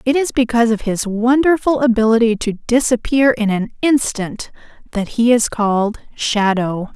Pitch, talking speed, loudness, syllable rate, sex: 230 Hz, 145 wpm, -16 LUFS, 4.8 syllables/s, female